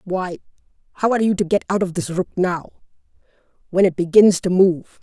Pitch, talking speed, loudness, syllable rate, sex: 185 Hz, 190 wpm, -18 LUFS, 5.8 syllables/s, female